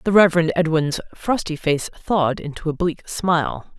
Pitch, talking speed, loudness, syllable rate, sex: 165 Hz, 160 wpm, -21 LUFS, 5.0 syllables/s, female